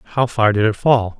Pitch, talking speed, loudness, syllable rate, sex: 115 Hz, 250 wpm, -16 LUFS, 5.9 syllables/s, male